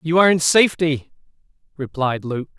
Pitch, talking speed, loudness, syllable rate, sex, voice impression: 155 Hz, 140 wpm, -18 LUFS, 5.6 syllables/s, male, masculine, adult-like, slightly relaxed, slightly powerful, slightly hard, muffled, raspy, intellectual, slightly friendly, slightly wild, lively, strict, sharp